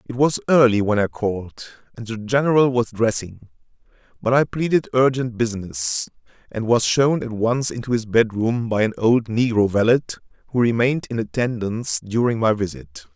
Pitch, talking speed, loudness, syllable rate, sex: 115 Hz, 170 wpm, -20 LUFS, 5.2 syllables/s, male